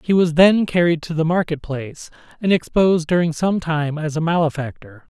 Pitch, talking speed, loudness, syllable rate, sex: 165 Hz, 185 wpm, -18 LUFS, 5.3 syllables/s, male